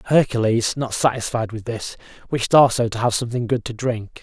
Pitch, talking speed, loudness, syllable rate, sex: 120 Hz, 200 wpm, -20 LUFS, 5.4 syllables/s, male